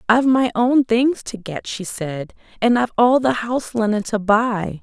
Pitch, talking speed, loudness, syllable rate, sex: 225 Hz, 200 wpm, -19 LUFS, 4.7 syllables/s, female